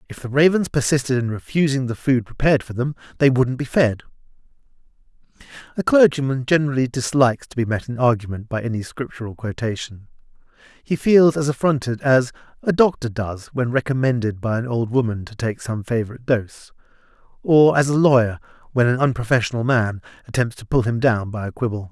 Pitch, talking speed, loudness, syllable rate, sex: 125 Hz, 170 wpm, -20 LUFS, 5.8 syllables/s, male